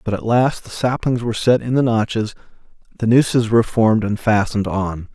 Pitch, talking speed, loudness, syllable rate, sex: 115 Hz, 200 wpm, -18 LUFS, 5.7 syllables/s, male